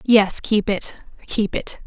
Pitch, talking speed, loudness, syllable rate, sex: 205 Hz, 130 wpm, -20 LUFS, 3.7 syllables/s, female